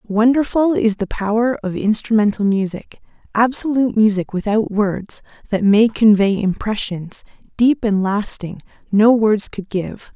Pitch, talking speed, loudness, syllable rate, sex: 215 Hz, 130 wpm, -17 LUFS, 4.3 syllables/s, female